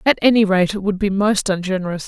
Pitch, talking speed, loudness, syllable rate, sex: 195 Hz, 230 wpm, -17 LUFS, 6.2 syllables/s, female